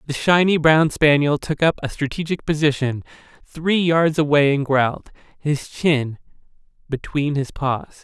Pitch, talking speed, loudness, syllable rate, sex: 150 Hz, 140 wpm, -19 LUFS, 4.5 syllables/s, male